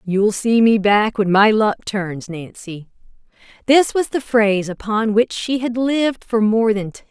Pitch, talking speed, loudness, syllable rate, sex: 215 Hz, 195 wpm, -17 LUFS, 4.4 syllables/s, female